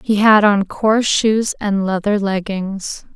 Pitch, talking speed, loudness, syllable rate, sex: 205 Hz, 150 wpm, -16 LUFS, 3.7 syllables/s, female